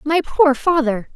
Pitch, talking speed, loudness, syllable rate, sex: 285 Hz, 155 wpm, -17 LUFS, 3.9 syllables/s, female